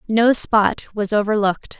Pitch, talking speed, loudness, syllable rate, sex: 210 Hz, 135 wpm, -18 LUFS, 4.6 syllables/s, female